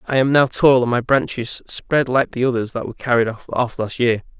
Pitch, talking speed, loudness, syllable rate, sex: 125 Hz, 230 wpm, -18 LUFS, 5.2 syllables/s, male